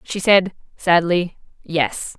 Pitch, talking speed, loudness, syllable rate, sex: 175 Hz, 110 wpm, -18 LUFS, 3.1 syllables/s, female